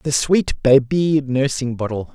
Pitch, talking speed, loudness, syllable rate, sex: 135 Hz, 140 wpm, -18 LUFS, 3.9 syllables/s, male